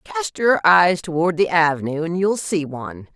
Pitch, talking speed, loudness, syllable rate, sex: 170 Hz, 190 wpm, -18 LUFS, 4.7 syllables/s, female